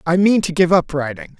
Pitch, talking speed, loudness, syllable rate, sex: 175 Hz, 260 wpm, -16 LUFS, 5.5 syllables/s, male